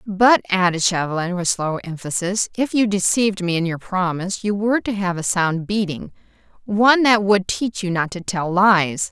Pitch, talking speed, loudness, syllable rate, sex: 190 Hz, 190 wpm, -19 LUFS, 5.0 syllables/s, female